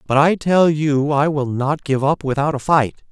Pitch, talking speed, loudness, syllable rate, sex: 145 Hz, 230 wpm, -17 LUFS, 4.4 syllables/s, male